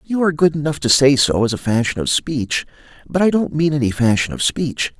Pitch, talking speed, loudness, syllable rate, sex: 140 Hz, 240 wpm, -17 LUFS, 5.6 syllables/s, male